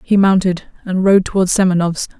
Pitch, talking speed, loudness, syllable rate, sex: 185 Hz, 165 wpm, -15 LUFS, 5.3 syllables/s, female